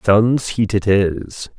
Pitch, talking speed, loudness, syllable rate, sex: 105 Hz, 150 wpm, -17 LUFS, 2.8 syllables/s, male